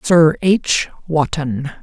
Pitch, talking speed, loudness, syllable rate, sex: 155 Hz, 100 wpm, -16 LUFS, 2.9 syllables/s, male